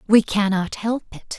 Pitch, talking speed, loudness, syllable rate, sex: 205 Hz, 175 wpm, -21 LUFS, 4.2 syllables/s, female